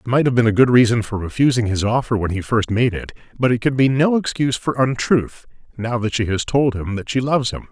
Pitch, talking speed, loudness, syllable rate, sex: 120 Hz, 265 wpm, -18 LUFS, 5.9 syllables/s, male